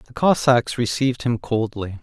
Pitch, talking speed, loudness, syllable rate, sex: 115 Hz, 150 wpm, -20 LUFS, 4.6 syllables/s, male